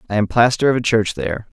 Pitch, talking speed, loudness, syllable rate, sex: 110 Hz, 265 wpm, -17 LUFS, 6.9 syllables/s, male